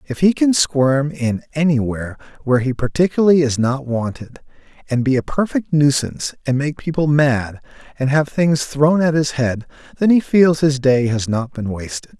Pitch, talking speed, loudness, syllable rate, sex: 140 Hz, 180 wpm, -17 LUFS, 4.9 syllables/s, male